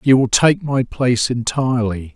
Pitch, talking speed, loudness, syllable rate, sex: 125 Hz, 165 wpm, -17 LUFS, 4.9 syllables/s, male